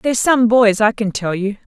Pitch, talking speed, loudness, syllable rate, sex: 220 Hz, 240 wpm, -15 LUFS, 5.1 syllables/s, female